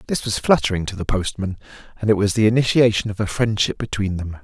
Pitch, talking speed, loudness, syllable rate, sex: 105 Hz, 215 wpm, -20 LUFS, 6.2 syllables/s, male